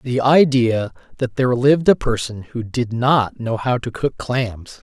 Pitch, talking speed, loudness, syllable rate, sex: 120 Hz, 185 wpm, -18 LUFS, 4.3 syllables/s, male